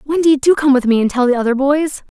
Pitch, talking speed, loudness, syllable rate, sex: 275 Hz, 275 wpm, -14 LUFS, 6.1 syllables/s, female